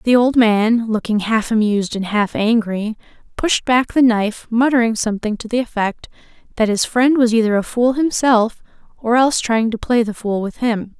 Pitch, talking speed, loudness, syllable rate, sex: 225 Hz, 190 wpm, -17 LUFS, 4.9 syllables/s, female